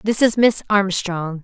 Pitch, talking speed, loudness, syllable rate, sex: 195 Hz, 170 wpm, -18 LUFS, 4.0 syllables/s, female